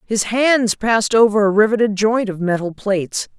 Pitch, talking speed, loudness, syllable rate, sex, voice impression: 215 Hz, 175 wpm, -16 LUFS, 5.0 syllables/s, female, very feminine, very adult-like, middle-aged, slightly thin, very tensed, very powerful, bright, very hard, very clear, very fluent, raspy, very cool, very intellectual, refreshing, sincere, slightly calm, slightly friendly, slightly reassuring, very unique, elegant, slightly wild, slightly sweet, very lively, very strict, very intense, very sharp